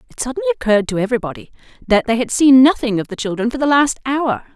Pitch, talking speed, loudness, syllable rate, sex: 245 Hz, 225 wpm, -16 LUFS, 7.2 syllables/s, female